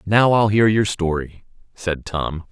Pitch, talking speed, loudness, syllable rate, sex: 95 Hz, 165 wpm, -19 LUFS, 3.9 syllables/s, male